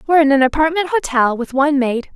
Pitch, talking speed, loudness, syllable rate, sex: 285 Hz, 220 wpm, -15 LUFS, 6.7 syllables/s, female